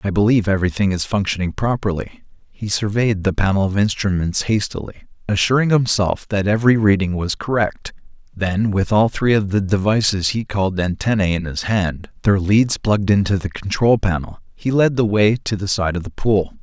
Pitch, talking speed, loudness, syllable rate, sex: 100 Hz, 180 wpm, -18 LUFS, 5.3 syllables/s, male